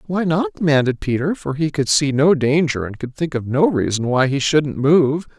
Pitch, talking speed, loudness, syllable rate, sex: 150 Hz, 225 wpm, -18 LUFS, 4.9 syllables/s, male